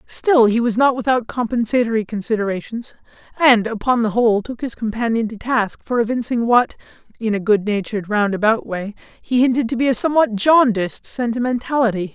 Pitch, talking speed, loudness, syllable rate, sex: 230 Hz, 165 wpm, -18 LUFS, 5.7 syllables/s, male